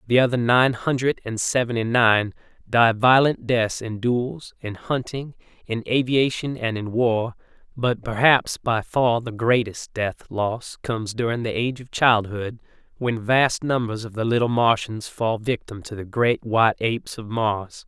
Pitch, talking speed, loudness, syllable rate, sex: 115 Hz, 165 wpm, -22 LUFS, 4.2 syllables/s, male